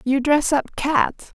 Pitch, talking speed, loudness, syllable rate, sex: 280 Hz, 175 wpm, -20 LUFS, 3.3 syllables/s, female